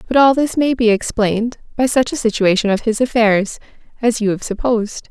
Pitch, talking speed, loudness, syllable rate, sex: 230 Hz, 200 wpm, -16 LUFS, 5.5 syllables/s, female